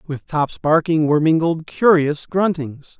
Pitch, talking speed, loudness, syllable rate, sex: 160 Hz, 140 wpm, -18 LUFS, 4.2 syllables/s, male